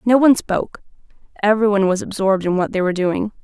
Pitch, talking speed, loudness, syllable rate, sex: 200 Hz, 210 wpm, -18 LUFS, 7.6 syllables/s, female